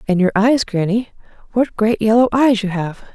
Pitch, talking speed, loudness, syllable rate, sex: 215 Hz, 190 wpm, -16 LUFS, 5.0 syllables/s, female